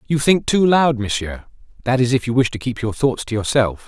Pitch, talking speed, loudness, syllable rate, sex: 125 Hz, 230 wpm, -18 LUFS, 5.4 syllables/s, male